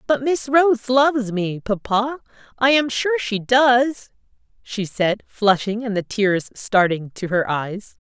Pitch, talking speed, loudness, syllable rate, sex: 230 Hz, 155 wpm, -19 LUFS, 3.6 syllables/s, female